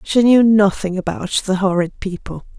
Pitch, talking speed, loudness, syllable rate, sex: 200 Hz, 165 wpm, -16 LUFS, 4.7 syllables/s, female